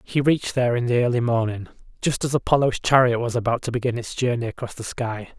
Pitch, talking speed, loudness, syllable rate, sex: 120 Hz, 225 wpm, -22 LUFS, 6.3 syllables/s, male